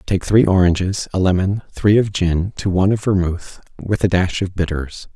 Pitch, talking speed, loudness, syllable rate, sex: 95 Hz, 200 wpm, -18 LUFS, 5.0 syllables/s, male